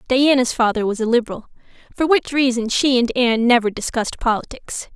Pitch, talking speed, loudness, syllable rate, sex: 240 Hz, 170 wpm, -18 LUFS, 5.9 syllables/s, female